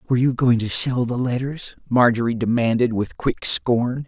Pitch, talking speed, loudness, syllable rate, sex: 120 Hz, 175 wpm, -20 LUFS, 4.8 syllables/s, male